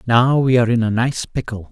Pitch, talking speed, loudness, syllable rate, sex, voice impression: 115 Hz, 245 wpm, -17 LUFS, 5.7 syllables/s, male, masculine, adult-like, weak, slightly bright, slightly raspy, sincere, calm, slightly mature, friendly, reassuring, wild, kind, modest